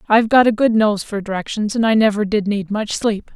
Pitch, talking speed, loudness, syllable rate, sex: 210 Hz, 250 wpm, -17 LUFS, 5.7 syllables/s, female